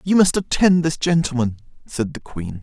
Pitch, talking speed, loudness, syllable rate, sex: 145 Hz, 185 wpm, -19 LUFS, 4.9 syllables/s, male